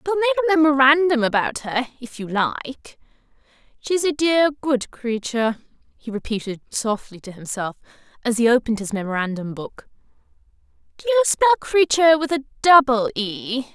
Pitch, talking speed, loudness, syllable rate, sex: 260 Hz, 145 wpm, -20 LUFS, 5.7 syllables/s, female